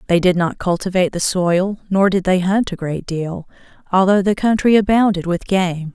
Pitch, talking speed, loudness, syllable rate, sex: 185 Hz, 190 wpm, -17 LUFS, 5.0 syllables/s, female